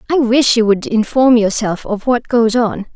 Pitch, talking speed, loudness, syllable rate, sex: 230 Hz, 205 wpm, -14 LUFS, 4.5 syllables/s, female